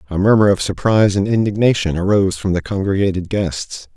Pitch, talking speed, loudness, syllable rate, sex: 95 Hz, 165 wpm, -16 LUFS, 5.9 syllables/s, male